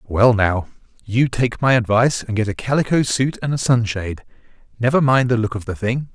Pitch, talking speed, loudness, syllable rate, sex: 115 Hz, 205 wpm, -18 LUFS, 5.4 syllables/s, male